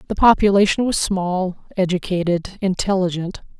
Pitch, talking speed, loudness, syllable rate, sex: 190 Hz, 100 wpm, -19 LUFS, 5.0 syllables/s, female